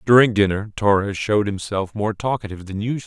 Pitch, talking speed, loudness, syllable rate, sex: 105 Hz, 175 wpm, -20 LUFS, 6.2 syllables/s, male